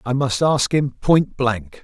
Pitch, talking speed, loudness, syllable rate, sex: 125 Hz, 195 wpm, -19 LUFS, 3.5 syllables/s, male